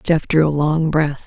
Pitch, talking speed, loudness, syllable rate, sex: 155 Hz, 235 wpm, -17 LUFS, 4.1 syllables/s, female